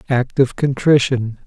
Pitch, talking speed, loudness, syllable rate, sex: 130 Hz, 125 wpm, -17 LUFS, 4.1 syllables/s, male